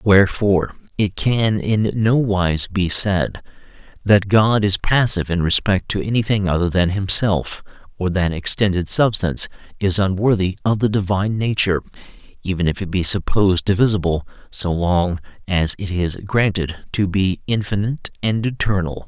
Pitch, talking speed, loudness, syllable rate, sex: 95 Hz, 140 wpm, -19 LUFS, 4.9 syllables/s, male